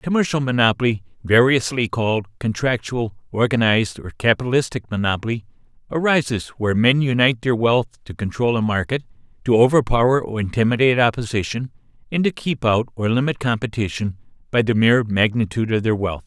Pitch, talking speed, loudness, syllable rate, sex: 115 Hz, 140 wpm, -19 LUFS, 5.9 syllables/s, male